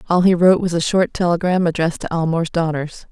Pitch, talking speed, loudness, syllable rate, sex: 170 Hz, 210 wpm, -17 LUFS, 6.6 syllables/s, female